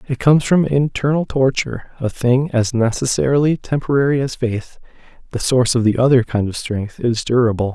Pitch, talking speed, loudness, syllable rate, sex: 125 Hz, 165 wpm, -17 LUFS, 4.5 syllables/s, male